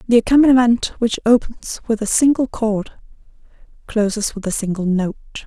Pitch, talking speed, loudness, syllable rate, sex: 225 Hz, 145 wpm, -17 LUFS, 5.3 syllables/s, female